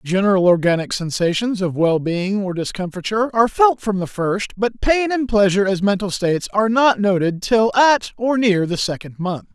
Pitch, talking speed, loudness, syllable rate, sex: 200 Hz, 190 wpm, -18 LUFS, 5.2 syllables/s, male